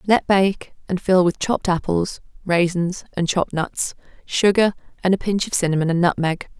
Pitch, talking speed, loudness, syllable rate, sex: 180 Hz, 175 wpm, -20 LUFS, 5.0 syllables/s, female